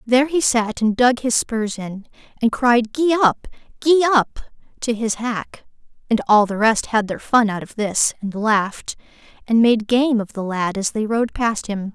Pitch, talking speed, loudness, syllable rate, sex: 230 Hz, 200 wpm, -19 LUFS, 4.4 syllables/s, female